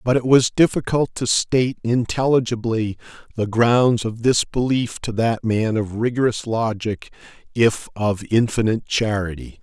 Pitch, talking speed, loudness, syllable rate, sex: 115 Hz, 135 wpm, -20 LUFS, 4.5 syllables/s, male